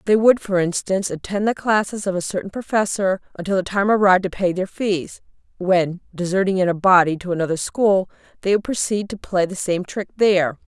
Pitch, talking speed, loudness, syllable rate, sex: 190 Hz, 200 wpm, -20 LUFS, 5.6 syllables/s, female